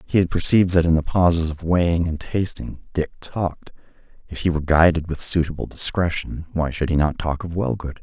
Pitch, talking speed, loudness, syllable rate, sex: 85 Hz, 200 wpm, -21 LUFS, 5.6 syllables/s, male